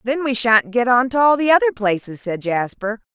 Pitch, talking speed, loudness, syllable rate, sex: 235 Hz, 230 wpm, -18 LUFS, 5.3 syllables/s, female